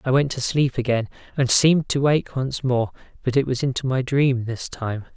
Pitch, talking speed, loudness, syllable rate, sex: 130 Hz, 220 wpm, -22 LUFS, 5.0 syllables/s, male